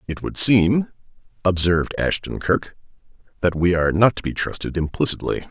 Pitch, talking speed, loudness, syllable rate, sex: 95 Hz, 155 wpm, -20 LUFS, 5.3 syllables/s, male